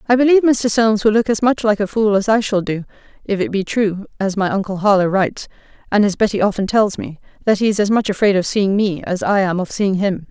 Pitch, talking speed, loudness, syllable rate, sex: 205 Hz, 260 wpm, -17 LUFS, 6.2 syllables/s, female